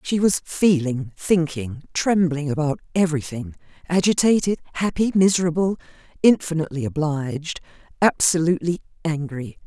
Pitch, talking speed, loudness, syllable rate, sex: 160 Hz, 85 wpm, -21 LUFS, 5.1 syllables/s, female